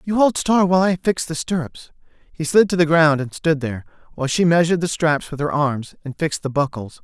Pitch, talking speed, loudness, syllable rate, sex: 160 Hz, 240 wpm, -19 LUFS, 5.8 syllables/s, male